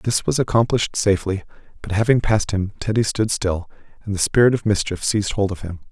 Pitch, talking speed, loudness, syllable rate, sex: 100 Hz, 205 wpm, -20 LUFS, 6.2 syllables/s, male